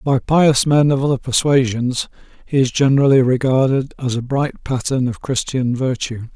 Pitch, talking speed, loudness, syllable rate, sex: 130 Hz, 160 wpm, -17 LUFS, 4.8 syllables/s, male